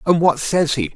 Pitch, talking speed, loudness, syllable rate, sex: 155 Hz, 255 wpm, -18 LUFS, 4.9 syllables/s, male